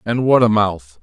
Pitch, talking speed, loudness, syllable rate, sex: 105 Hz, 235 wpm, -15 LUFS, 4.4 syllables/s, male